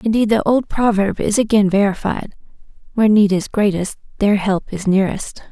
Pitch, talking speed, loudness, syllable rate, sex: 205 Hz, 165 wpm, -17 LUFS, 5.6 syllables/s, female